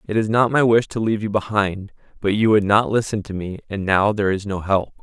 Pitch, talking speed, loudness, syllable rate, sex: 105 Hz, 265 wpm, -19 LUFS, 5.9 syllables/s, male